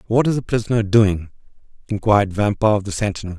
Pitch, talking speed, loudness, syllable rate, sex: 105 Hz, 175 wpm, -19 LUFS, 6.4 syllables/s, male